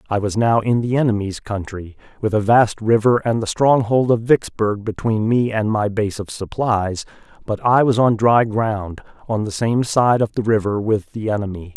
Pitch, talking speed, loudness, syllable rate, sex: 110 Hz, 200 wpm, -18 LUFS, 4.7 syllables/s, male